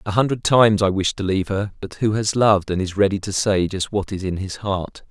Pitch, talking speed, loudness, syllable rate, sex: 100 Hz, 270 wpm, -20 LUFS, 5.7 syllables/s, male